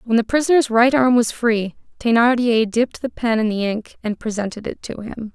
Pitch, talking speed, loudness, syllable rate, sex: 230 Hz, 215 wpm, -19 LUFS, 5.2 syllables/s, female